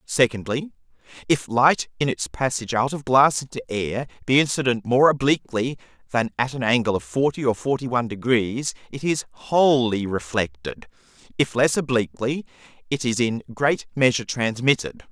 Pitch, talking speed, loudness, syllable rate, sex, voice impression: 125 Hz, 150 wpm, -22 LUFS, 5.1 syllables/s, male, very masculine, slightly adult-like, slightly middle-aged, slightly thick, slightly tensed, slightly weak, bright, soft, clear, very fluent, slightly cool, intellectual, refreshing, very sincere, calm, slightly friendly, slightly reassuring, very unique, slightly elegant, slightly wild, slightly sweet, slightly lively, kind, slightly modest, slightly light